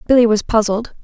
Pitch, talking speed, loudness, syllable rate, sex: 225 Hz, 175 wpm, -15 LUFS, 6.1 syllables/s, female